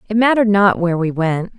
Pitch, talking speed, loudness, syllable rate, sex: 195 Hz, 225 wpm, -15 LUFS, 6.3 syllables/s, female